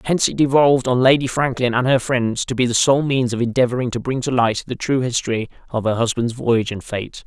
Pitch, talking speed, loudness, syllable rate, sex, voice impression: 125 Hz, 240 wpm, -18 LUFS, 6.0 syllables/s, male, very masculine, adult-like, slightly thick, tensed, slightly powerful, slightly bright, very hard, clear, fluent, slightly raspy, cool, slightly intellectual, refreshing, very sincere, slightly calm, friendly, reassuring, slightly unique, elegant, kind, slightly modest